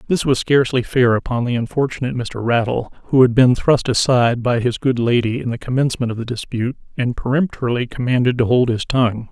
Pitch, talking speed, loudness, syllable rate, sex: 125 Hz, 200 wpm, -18 LUFS, 6.2 syllables/s, male